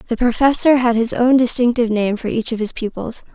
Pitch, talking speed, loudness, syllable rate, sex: 235 Hz, 215 wpm, -16 LUFS, 5.8 syllables/s, female